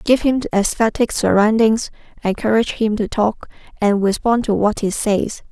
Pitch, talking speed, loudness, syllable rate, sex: 215 Hz, 150 wpm, -17 LUFS, 4.7 syllables/s, female